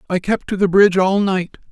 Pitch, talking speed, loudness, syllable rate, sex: 190 Hz, 245 wpm, -16 LUFS, 5.7 syllables/s, male